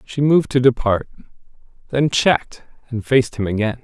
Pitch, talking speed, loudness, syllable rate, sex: 125 Hz, 155 wpm, -18 LUFS, 5.6 syllables/s, male